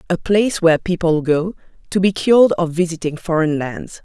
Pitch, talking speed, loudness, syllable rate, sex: 170 Hz, 180 wpm, -17 LUFS, 5.5 syllables/s, female